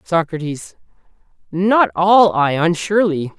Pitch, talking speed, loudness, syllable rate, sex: 180 Hz, 90 wpm, -16 LUFS, 3.7 syllables/s, male